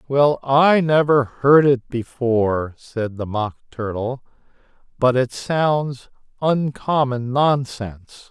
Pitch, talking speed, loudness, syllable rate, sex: 130 Hz, 110 wpm, -19 LUFS, 3.4 syllables/s, male